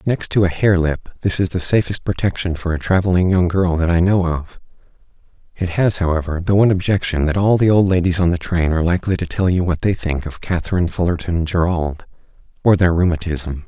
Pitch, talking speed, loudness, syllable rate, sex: 90 Hz, 210 wpm, -18 LUFS, 5.9 syllables/s, male